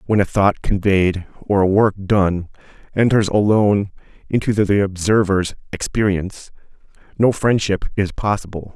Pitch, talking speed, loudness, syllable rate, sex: 100 Hz, 125 wpm, -18 LUFS, 4.6 syllables/s, male